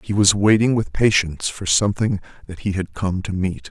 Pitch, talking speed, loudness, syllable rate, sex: 95 Hz, 210 wpm, -19 LUFS, 5.4 syllables/s, male